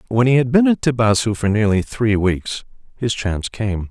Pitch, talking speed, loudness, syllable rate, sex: 115 Hz, 200 wpm, -18 LUFS, 5.0 syllables/s, male